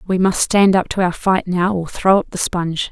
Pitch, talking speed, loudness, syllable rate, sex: 185 Hz, 270 wpm, -17 LUFS, 5.1 syllables/s, female